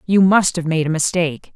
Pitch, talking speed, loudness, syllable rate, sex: 170 Hz, 230 wpm, -17 LUFS, 5.7 syllables/s, female